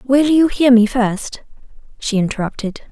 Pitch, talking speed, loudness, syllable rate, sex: 240 Hz, 145 wpm, -16 LUFS, 4.6 syllables/s, female